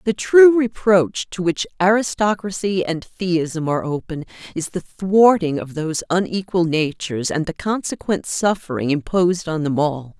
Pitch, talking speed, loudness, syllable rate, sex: 175 Hz, 145 wpm, -19 LUFS, 4.7 syllables/s, female